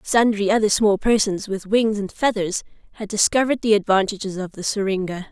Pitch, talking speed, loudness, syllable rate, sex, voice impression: 205 Hz, 170 wpm, -20 LUFS, 5.6 syllables/s, female, feminine, adult-like, tensed, powerful, slightly bright, clear, fluent, intellectual, friendly, lively, intense